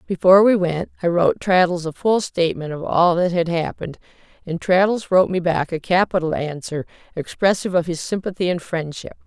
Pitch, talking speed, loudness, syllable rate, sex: 175 Hz, 180 wpm, -19 LUFS, 5.8 syllables/s, female